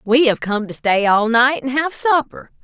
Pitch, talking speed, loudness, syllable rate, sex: 250 Hz, 230 wpm, -16 LUFS, 4.5 syllables/s, female